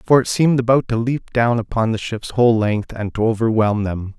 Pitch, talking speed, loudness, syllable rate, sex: 115 Hz, 230 wpm, -18 LUFS, 5.5 syllables/s, male